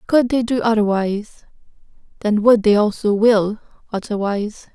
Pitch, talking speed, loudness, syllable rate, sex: 215 Hz, 125 wpm, -18 LUFS, 4.9 syllables/s, female